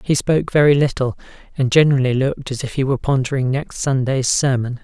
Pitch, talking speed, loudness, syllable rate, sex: 135 Hz, 185 wpm, -18 LUFS, 6.2 syllables/s, male